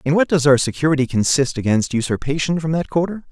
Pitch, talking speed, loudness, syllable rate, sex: 145 Hz, 200 wpm, -18 LUFS, 6.3 syllables/s, male